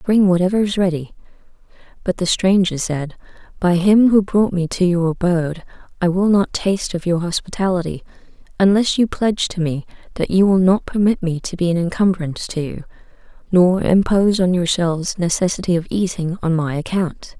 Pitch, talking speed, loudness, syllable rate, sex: 180 Hz, 170 wpm, -18 LUFS, 5.4 syllables/s, female